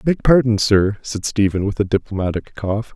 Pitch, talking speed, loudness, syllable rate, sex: 105 Hz, 185 wpm, -18 LUFS, 5.0 syllables/s, male